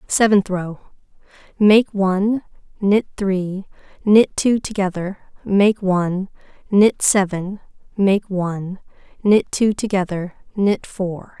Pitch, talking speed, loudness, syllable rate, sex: 195 Hz, 100 wpm, -18 LUFS, 3.7 syllables/s, female